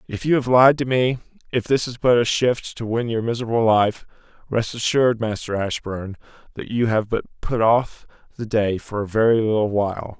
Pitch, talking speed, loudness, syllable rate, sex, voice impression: 115 Hz, 200 wpm, -20 LUFS, 5.3 syllables/s, male, masculine, adult-like, thick, tensed, slightly hard, slightly muffled, raspy, cool, intellectual, calm, reassuring, wild, lively, modest